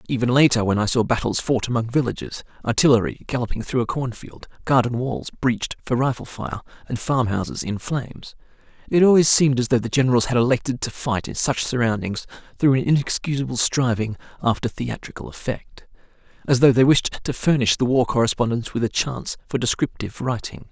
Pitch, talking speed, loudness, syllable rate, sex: 125 Hz, 175 wpm, -21 LUFS, 5.8 syllables/s, male